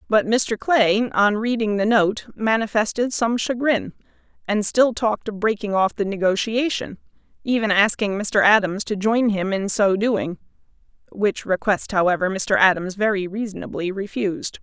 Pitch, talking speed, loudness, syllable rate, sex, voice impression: 210 Hz, 150 wpm, -20 LUFS, 4.7 syllables/s, female, slightly feminine, adult-like, fluent, slightly unique